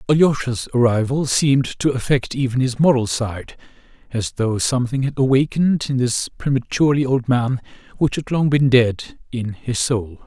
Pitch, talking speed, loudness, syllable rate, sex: 125 Hz, 160 wpm, -19 LUFS, 4.9 syllables/s, male